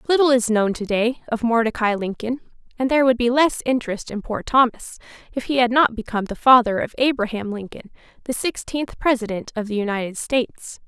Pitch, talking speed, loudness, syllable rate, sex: 235 Hz, 180 wpm, -20 LUFS, 5.7 syllables/s, female